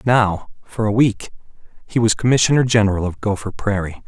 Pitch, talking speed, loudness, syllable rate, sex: 110 Hz, 160 wpm, -18 LUFS, 5.6 syllables/s, male